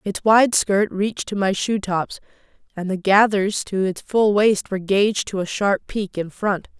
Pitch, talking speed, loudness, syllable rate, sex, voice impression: 200 Hz, 195 wpm, -20 LUFS, 4.5 syllables/s, female, feminine, adult-like, tensed, powerful, clear, slightly raspy, slightly intellectual, unique, slightly wild, lively, slightly strict, intense, sharp